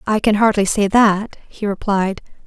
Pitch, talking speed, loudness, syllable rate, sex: 205 Hz, 170 wpm, -17 LUFS, 4.4 syllables/s, female